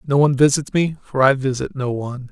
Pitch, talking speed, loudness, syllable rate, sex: 135 Hz, 235 wpm, -18 LUFS, 6.2 syllables/s, male